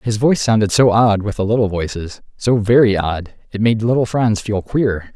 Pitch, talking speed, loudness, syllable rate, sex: 110 Hz, 185 wpm, -16 LUFS, 5.1 syllables/s, male